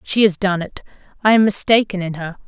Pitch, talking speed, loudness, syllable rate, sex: 195 Hz, 220 wpm, -17 LUFS, 5.8 syllables/s, female